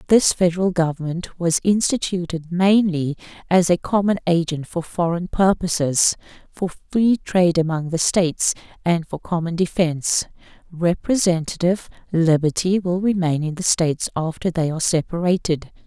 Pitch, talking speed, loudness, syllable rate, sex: 175 Hz, 130 wpm, -20 LUFS, 4.9 syllables/s, female